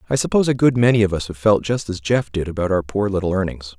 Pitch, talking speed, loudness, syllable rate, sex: 100 Hz, 285 wpm, -19 LUFS, 6.7 syllables/s, male